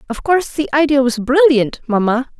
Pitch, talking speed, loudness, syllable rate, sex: 270 Hz, 175 wpm, -15 LUFS, 5.3 syllables/s, female